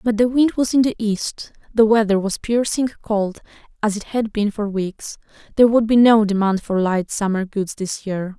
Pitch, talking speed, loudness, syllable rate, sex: 215 Hz, 210 wpm, -19 LUFS, 4.8 syllables/s, female